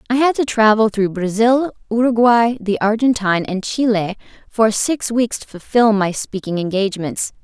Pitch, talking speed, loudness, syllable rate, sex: 220 Hz, 155 wpm, -17 LUFS, 4.8 syllables/s, female